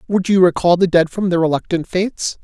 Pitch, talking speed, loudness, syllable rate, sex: 180 Hz, 220 wpm, -16 LUFS, 5.8 syllables/s, male